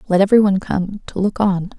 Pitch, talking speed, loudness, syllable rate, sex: 195 Hz, 235 wpm, -17 LUFS, 6.5 syllables/s, female